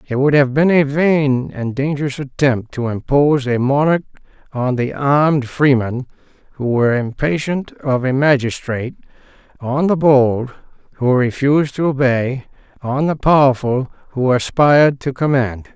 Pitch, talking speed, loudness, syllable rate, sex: 135 Hz, 140 wpm, -16 LUFS, 4.6 syllables/s, male